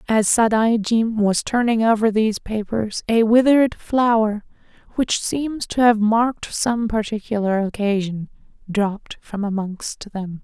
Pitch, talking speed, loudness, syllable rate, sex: 220 Hz, 125 wpm, -19 LUFS, 4.2 syllables/s, female